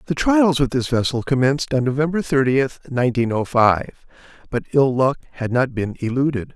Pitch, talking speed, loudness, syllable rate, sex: 130 Hz, 175 wpm, -19 LUFS, 5.3 syllables/s, male